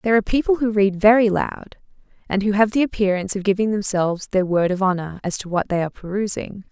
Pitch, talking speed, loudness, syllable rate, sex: 200 Hz, 225 wpm, -20 LUFS, 6.3 syllables/s, female